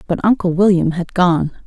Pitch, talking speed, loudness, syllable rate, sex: 180 Hz, 180 wpm, -15 LUFS, 5.0 syllables/s, female